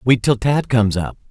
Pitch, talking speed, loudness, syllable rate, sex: 120 Hz, 230 wpm, -17 LUFS, 5.2 syllables/s, male